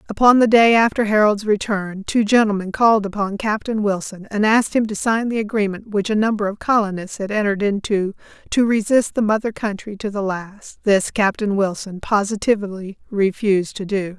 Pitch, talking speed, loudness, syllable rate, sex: 205 Hz, 180 wpm, -19 LUFS, 5.4 syllables/s, female